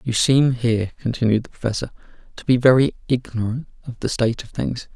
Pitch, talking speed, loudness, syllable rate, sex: 120 Hz, 180 wpm, -20 LUFS, 5.9 syllables/s, male